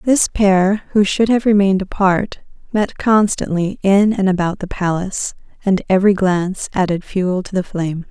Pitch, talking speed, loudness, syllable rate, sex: 190 Hz, 165 wpm, -16 LUFS, 4.9 syllables/s, female